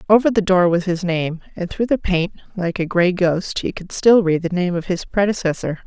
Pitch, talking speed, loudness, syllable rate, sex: 185 Hz, 235 wpm, -19 LUFS, 5.1 syllables/s, female